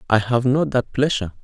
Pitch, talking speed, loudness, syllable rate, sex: 120 Hz, 210 wpm, -20 LUFS, 5.9 syllables/s, male